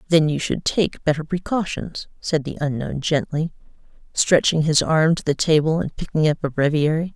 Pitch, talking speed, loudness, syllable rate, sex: 155 Hz, 175 wpm, -21 LUFS, 5.0 syllables/s, female